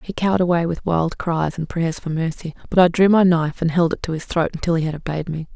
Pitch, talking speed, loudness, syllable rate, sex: 170 Hz, 280 wpm, -20 LUFS, 6.4 syllables/s, female